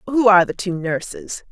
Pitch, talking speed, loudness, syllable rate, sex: 210 Hz, 200 wpm, -17 LUFS, 5.5 syllables/s, female